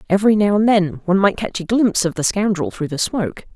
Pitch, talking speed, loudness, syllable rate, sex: 190 Hz, 255 wpm, -18 LUFS, 6.4 syllables/s, female